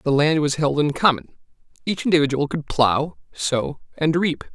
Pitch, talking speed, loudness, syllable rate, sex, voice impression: 150 Hz, 170 wpm, -21 LUFS, 4.7 syllables/s, male, masculine, adult-like, tensed, powerful, bright, clear, friendly, unique, slightly wild, lively, intense